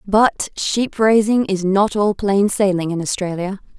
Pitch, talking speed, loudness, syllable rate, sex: 200 Hz, 160 wpm, -18 LUFS, 4.0 syllables/s, female